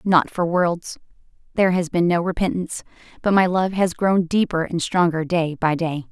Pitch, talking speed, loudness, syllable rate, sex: 175 Hz, 185 wpm, -20 LUFS, 5.0 syllables/s, female